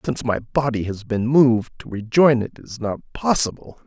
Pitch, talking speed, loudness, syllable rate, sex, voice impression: 125 Hz, 185 wpm, -20 LUFS, 5.3 syllables/s, male, masculine, adult-like, tensed, powerful, clear, slightly raspy, cool, intellectual, calm, slightly mature, reassuring, wild, lively, slightly sharp